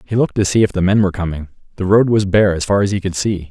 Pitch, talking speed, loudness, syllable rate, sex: 95 Hz, 325 wpm, -16 LUFS, 7.1 syllables/s, male